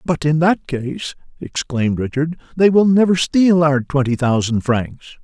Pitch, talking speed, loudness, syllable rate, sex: 150 Hz, 160 wpm, -17 LUFS, 4.4 syllables/s, male